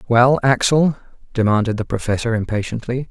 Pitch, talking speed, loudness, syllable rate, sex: 120 Hz, 115 wpm, -18 LUFS, 5.5 syllables/s, male